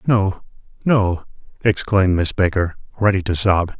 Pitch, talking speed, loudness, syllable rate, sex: 95 Hz, 125 wpm, -19 LUFS, 4.6 syllables/s, male